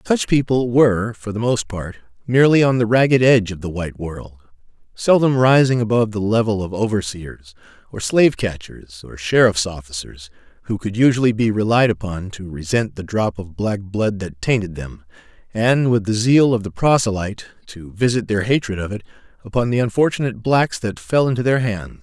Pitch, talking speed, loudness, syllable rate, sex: 110 Hz, 185 wpm, -18 LUFS, 5.4 syllables/s, male